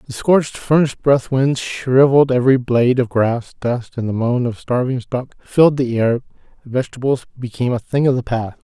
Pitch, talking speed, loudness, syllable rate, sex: 125 Hz, 185 wpm, -17 LUFS, 5.4 syllables/s, male